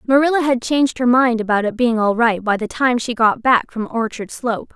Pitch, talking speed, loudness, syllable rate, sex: 240 Hz, 240 wpm, -17 LUFS, 5.5 syllables/s, female